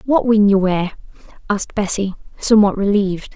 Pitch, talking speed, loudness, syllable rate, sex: 200 Hz, 145 wpm, -17 LUFS, 5.7 syllables/s, female